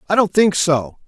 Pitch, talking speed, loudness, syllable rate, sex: 175 Hz, 225 wpm, -16 LUFS, 4.7 syllables/s, male